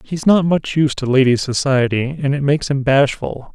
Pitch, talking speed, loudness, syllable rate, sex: 140 Hz, 205 wpm, -16 LUFS, 5.1 syllables/s, male